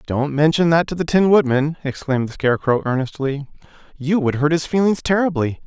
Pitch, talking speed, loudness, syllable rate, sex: 150 Hz, 180 wpm, -18 LUFS, 5.7 syllables/s, male